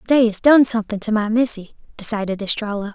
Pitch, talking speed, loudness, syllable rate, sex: 220 Hz, 165 wpm, -18 LUFS, 6.2 syllables/s, female